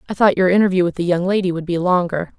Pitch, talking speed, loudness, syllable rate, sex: 180 Hz, 275 wpm, -17 LUFS, 6.9 syllables/s, female